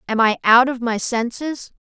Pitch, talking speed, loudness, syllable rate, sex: 240 Hz, 195 wpm, -18 LUFS, 4.6 syllables/s, female